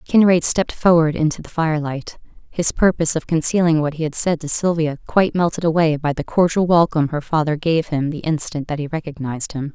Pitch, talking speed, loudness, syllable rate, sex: 160 Hz, 205 wpm, -18 LUFS, 5.9 syllables/s, female